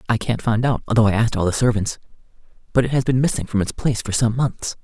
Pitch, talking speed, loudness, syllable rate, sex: 115 Hz, 260 wpm, -20 LUFS, 6.8 syllables/s, male